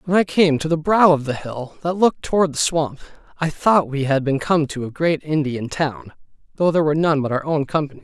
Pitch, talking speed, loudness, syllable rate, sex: 155 Hz, 245 wpm, -19 LUFS, 4.4 syllables/s, male